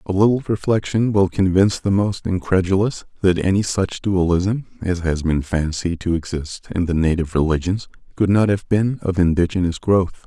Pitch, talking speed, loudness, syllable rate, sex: 95 Hz, 170 wpm, -19 LUFS, 5.1 syllables/s, male